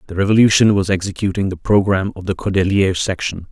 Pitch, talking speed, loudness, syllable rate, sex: 95 Hz, 170 wpm, -16 LUFS, 6.4 syllables/s, male